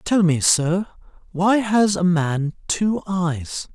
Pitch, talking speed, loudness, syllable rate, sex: 180 Hz, 145 wpm, -20 LUFS, 3.0 syllables/s, male